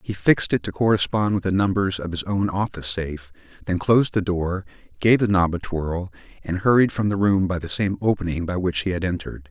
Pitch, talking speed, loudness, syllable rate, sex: 95 Hz, 225 wpm, -22 LUFS, 5.9 syllables/s, male